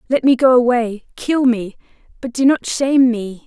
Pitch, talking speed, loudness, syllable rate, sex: 245 Hz, 190 wpm, -16 LUFS, 4.8 syllables/s, female